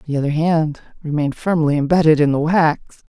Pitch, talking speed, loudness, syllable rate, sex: 155 Hz, 175 wpm, -17 LUFS, 5.1 syllables/s, female